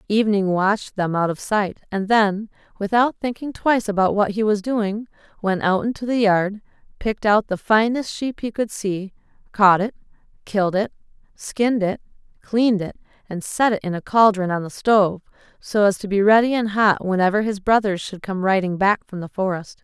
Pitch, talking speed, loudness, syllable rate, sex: 205 Hz, 190 wpm, -20 LUFS, 5.2 syllables/s, female